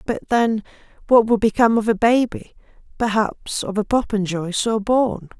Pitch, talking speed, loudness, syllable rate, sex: 220 Hz, 135 wpm, -19 LUFS, 4.8 syllables/s, female